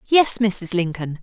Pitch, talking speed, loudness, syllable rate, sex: 200 Hz, 145 wpm, -20 LUFS, 3.8 syllables/s, female